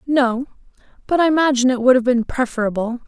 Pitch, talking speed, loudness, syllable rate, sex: 255 Hz, 175 wpm, -18 LUFS, 6.5 syllables/s, female